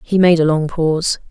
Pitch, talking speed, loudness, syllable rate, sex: 165 Hz, 230 wpm, -15 LUFS, 5.3 syllables/s, female